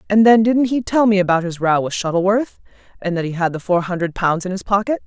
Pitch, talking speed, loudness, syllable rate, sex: 195 Hz, 260 wpm, -17 LUFS, 6.0 syllables/s, female